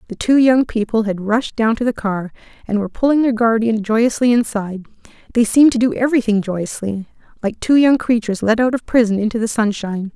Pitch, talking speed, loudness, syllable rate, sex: 225 Hz, 200 wpm, -17 LUFS, 5.9 syllables/s, female